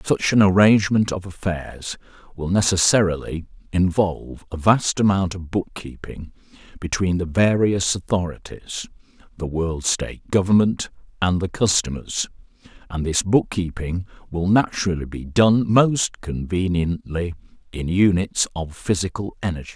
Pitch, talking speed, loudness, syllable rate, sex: 90 Hz, 120 wpm, -21 LUFS, 4.6 syllables/s, male